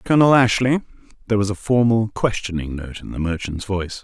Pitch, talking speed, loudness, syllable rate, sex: 105 Hz, 180 wpm, -20 LUFS, 6.2 syllables/s, male